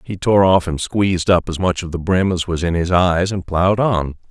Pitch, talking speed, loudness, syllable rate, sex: 90 Hz, 265 wpm, -17 LUFS, 5.2 syllables/s, male